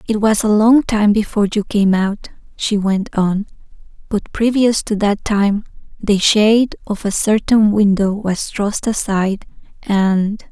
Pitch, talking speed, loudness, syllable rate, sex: 210 Hz, 155 wpm, -16 LUFS, 4.2 syllables/s, female